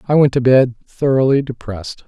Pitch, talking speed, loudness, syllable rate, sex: 130 Hz, 175 wpm, -15 LUFS, 5.6 syllables/s, male